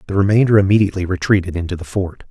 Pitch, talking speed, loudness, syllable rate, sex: 95 Hz, 180 wpm, -16 LUFS, 7.6 syllables/s, male